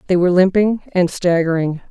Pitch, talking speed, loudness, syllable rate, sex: 180 Hz, 155 wpm, -16 LUFS, 5.7 syllables/s, female